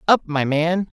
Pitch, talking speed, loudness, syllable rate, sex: 165 Hz, 180 wpm, -20 LUFS, 4.1 syllables/s, female